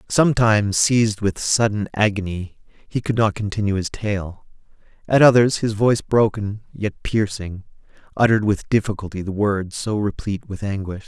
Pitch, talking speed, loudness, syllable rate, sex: 105 Hz, 145 wpm, -20 LUFS, 5.1 syllables/s, male